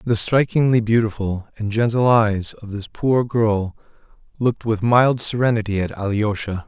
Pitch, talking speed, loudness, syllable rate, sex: 110 Hz, 145 wpm, -19 LUFS, 4.6 syllables/s, male